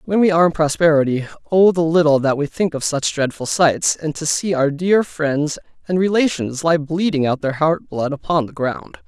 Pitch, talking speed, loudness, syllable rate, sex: 160 Hz, 210 wpm, -18 LUFS, 5.0 syllables/s, male